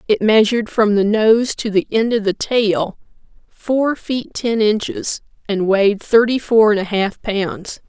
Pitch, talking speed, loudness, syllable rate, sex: 215 Hz, 175 wpm, -16 LUFS, 4.1 syllables/s, female